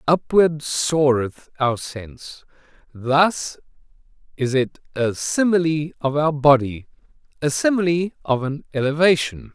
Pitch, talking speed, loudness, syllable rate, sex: 145 Hz, 105 wpm, -20 LUFS, 4.1 syllables/s, male